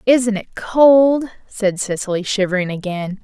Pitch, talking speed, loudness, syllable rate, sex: 215 Hz, 130 wpm, -17 LUFS, 4.1 syllables/s, female